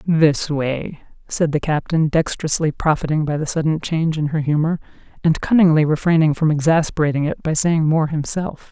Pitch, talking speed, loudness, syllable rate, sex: 155 Hz, 165 wpm, -18 LUFS, 5.4 syllables/s, female